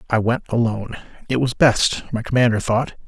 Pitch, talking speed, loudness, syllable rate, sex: 120 Hz, 175 wpm, -19 LUFS, 5.3 syllables/s, male